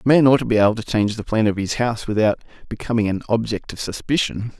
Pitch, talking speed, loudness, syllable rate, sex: 110 Hz, 250 wpm, -20 LUFS, 6.9 syllables/s, male